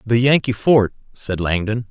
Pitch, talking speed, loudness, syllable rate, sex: 110 Hz, 155 wpm, -18 LUFS, 4.4 syllables/s, male